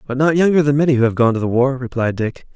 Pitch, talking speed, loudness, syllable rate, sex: 130 Hz, 305 wpm, -16 LUFS, 6.8 syllables/s, male